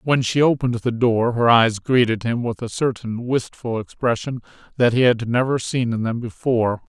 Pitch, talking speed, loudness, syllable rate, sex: 120 Hz, 190 wpm, -20 LUFS, 5.0 syllables/s, male